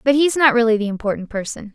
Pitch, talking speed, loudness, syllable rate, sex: 235 Hz, 240 wpm, -18 LUFS, 6.7 syllables/s, female